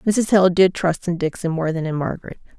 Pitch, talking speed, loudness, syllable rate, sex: 175 Hz, 230 wpm, -19 LUFS, 5.5 syllables/s, female